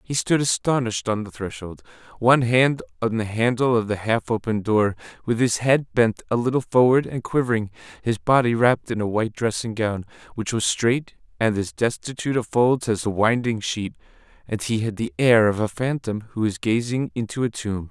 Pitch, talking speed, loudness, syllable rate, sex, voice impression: 115 Hz, 200 wpm, -22 LUFS, 5.3 syllables/s, male, masculine, adult-like, relaxed, powerful, muffled, slightly cool, slightly mature, slightly friendly, wild, lively, slightly intense, slightly sharp